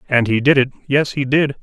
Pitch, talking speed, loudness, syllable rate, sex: 135 Hz, 260 wpm, -16 LUFS, 5.4 syllables/s, male